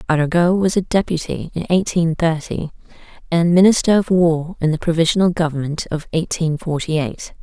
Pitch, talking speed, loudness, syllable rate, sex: 165 Hz, 155 wpm, -18 LUFS, 5.3 syllables/s, female